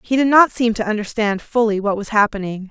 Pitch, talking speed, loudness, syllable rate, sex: 220 Hz, 220 wpm, -17 LUFS, 5.8 syllables/s, female